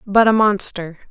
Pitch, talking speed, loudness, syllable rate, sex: 200 Hz, 165 wpm, -16 LUFS, 4.5 syllables/s, female